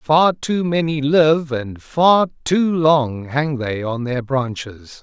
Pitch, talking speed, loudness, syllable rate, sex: 145 Hz, 155 wpm, -18 LUFS, 3.1 syllables/s, male